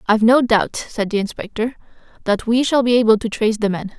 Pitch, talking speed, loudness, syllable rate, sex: 225 Hz, 225 wpm, -18 LUFS, 6.2 syllables/s, female